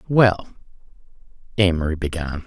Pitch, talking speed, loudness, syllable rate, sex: 90 Hz, 75 wpm, -21 LUFS, 4.7 syllables/s, male